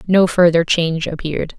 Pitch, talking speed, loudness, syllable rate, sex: 170 Hz, 150 wpm, -16 LUFS, 5.5 syllables/s, female